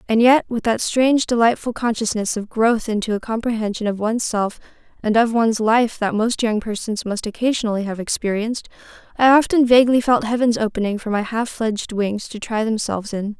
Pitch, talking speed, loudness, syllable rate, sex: 225 Hz, 190 wpm, -19 LUFS, 5.7 syllables/s, female